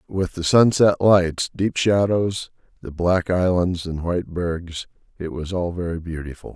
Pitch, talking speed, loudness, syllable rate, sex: 90 Hz, 155 wpm, -21 LUFS, 4.2 syllables/s, male